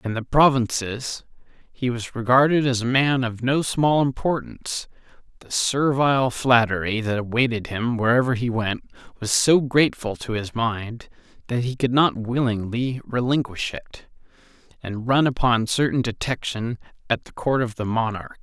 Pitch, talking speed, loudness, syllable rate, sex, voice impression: 120 Hz, 150 wpm, -22 LUFS, 4.7 syllables/s, male, masculine, adult-like, slightly cool, slightly intellectual, slightly kind